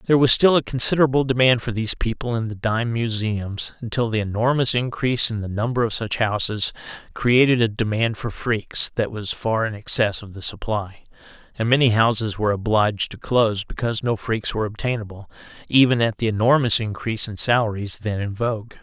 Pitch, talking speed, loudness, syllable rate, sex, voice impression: 115 Hz, 185 wpm, -21 LUFS, 5.7 syllables/s, male, masculine, very adult-like, muffled, sincere, slightly calm, slightly reassuring